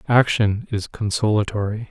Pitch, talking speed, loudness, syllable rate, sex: 105 Hz, 95 wpm, -21 LUFS, 4.7 syllables/s, male